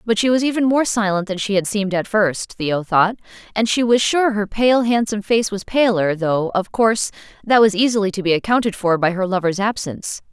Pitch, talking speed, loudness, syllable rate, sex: 210 Hz, 220 wpm, -18 LUFS, 5.5 syllables/s, female